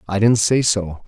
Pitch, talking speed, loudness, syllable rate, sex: 105 Hz, 220 wpm, -17 LUFS, 4.4 syllables/s, male